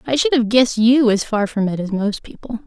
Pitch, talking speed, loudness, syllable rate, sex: 230 Hz, 270 wpm, -17 LUFS, 5.6 syllables/s, female